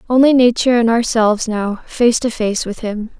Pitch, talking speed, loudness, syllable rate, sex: 230 Hz, 190 wpm, -15 LUFS, 5.1 syllables/s, female